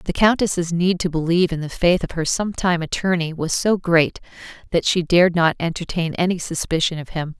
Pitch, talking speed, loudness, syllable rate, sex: 170 Hz, 195 wpm, -20 LUFS, 5.6 syllables/s, female